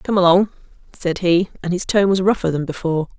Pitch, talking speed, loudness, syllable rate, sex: 180 Hz, 205 wpm, -18 LUFS, 6.1 syllables/s, female